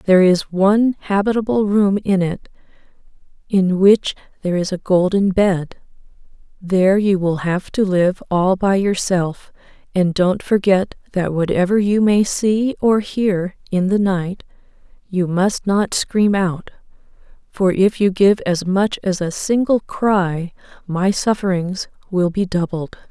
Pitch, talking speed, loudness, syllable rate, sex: 190 Hz, 145 wpm, -17 LUFS, 4.0 syllables/s, female